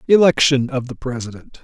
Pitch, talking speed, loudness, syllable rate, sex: 135 Hz, 145 wpm, -17 LUFS, 5.5 syllables/s, male